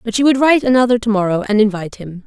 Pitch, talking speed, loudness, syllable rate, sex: 220 Hz, 265 wpm, -14 LUFS, 7.4 syllables/s, female